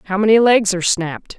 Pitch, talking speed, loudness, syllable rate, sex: 200 Hz, 215 wpm, -15 LUFS, 6.6 syllables/s, female